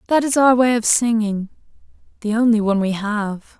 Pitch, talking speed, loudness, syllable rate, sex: 225 Hz, 185 wpm, -18 LUFS, 5.2 syllables/s, female